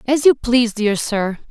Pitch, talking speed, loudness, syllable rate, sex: 235 Hz, 200 wpm, -17 LUFS, 4.5 syllables/s, female